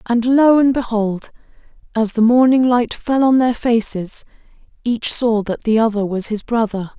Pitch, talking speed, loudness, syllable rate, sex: 230 Hz, 170 wpm, -16 LUFS, 4.5 syllables/s, female